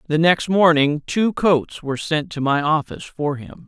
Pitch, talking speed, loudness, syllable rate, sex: 160 Hz, 195 wpm, -19 LUFS, 4.7 syllables/s, male